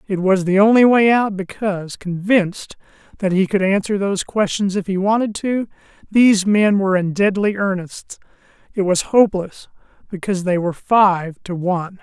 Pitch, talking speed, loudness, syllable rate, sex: 195 Hz, 160 wpm, -17 LUFS, 5.2 syllables/s, male